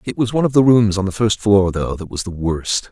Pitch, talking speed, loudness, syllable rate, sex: 100 Hz, 310 wpm, -17 LUFS, 5.7 syllables/s, male